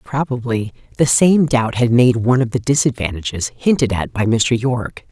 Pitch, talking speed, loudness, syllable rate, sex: 120 Hz, 175 wpm, -16 LUFS, 5.1 syllables/s, female